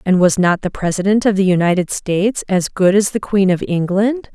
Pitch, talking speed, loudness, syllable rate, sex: 195 Hz, 220 wpm, -16 LUFS, 5.3 syllables/s, female